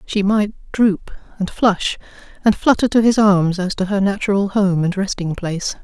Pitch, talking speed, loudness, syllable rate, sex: 200 Hz, 185 wpm, -17 LUFS, 4.8 syllables/s, female